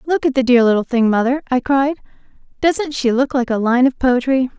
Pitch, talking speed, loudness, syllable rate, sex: 260 Hz, 225 wpm, -16 LUFS, 5.3 syllables/s, female